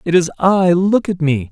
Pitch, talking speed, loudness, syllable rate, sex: 175 Hz, 235 wpm, -15 LUFS, 4.5 syllables/s, male